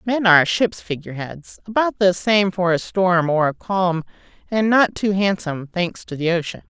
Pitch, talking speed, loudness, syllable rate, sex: 185 Hz, 195 wpm, -19 LUFS, 4.8 syllables/s, female